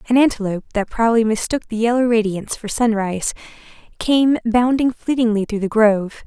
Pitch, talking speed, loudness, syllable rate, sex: 225 Hz, 155 wpm, -18 LUFS, 5.8 syllables/s, female